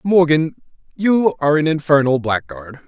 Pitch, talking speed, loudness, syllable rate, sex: 150 Hz, 125 wpm, -16 LUFS, 4.9 syllables/s, male